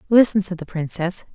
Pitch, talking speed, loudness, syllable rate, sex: 185 Hz, 180 wpm, -20 LUFS, 5.6 syllables/s, female